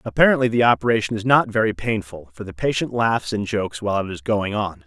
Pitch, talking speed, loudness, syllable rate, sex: 110 Hz, 220 wpm, -20 LUFS, 6.1 syllables/s, male